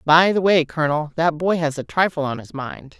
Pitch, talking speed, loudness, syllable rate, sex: 160 Hz, 240 wpm, -20 LUFS, 5.3 syllables/s, female